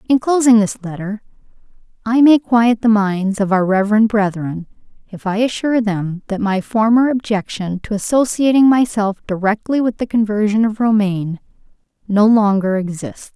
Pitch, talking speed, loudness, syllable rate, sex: 215 Hz, 150 wpm, -16 LUFS, 4.9 syllables/s, female